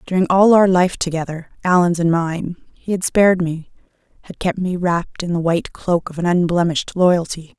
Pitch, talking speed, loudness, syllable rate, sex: 175 Hz, 190 wpm, -17 LUFS, 5.3 syllables/s, female